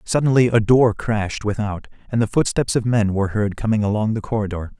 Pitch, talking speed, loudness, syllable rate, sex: 110 Hz, 200 wpm, -19 LUFS, 5.8 syllables/s, male